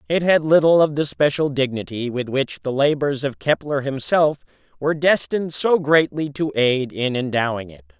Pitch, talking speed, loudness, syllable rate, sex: 140 Hz, 175 wpm, -20 LUFS, 5.0 syllables/s, male